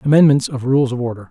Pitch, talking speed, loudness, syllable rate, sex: 130 Hz, 230 wpm, -16 LUFS, 6.7 syllables/s, male